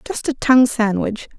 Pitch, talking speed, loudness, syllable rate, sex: 245 Hz, 175 wpm, -17 LUFS, 5.0 syllables/s, female